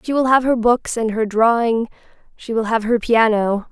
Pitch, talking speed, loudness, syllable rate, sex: 230 Hz, 210 wpm, -17 LUFS, 4.8 syllables/s, female